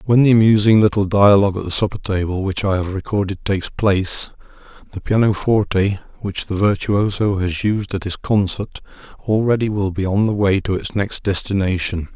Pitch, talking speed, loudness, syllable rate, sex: 100 Hz, 175 wpm, -18 LUFS, 5.3 syllables/s, male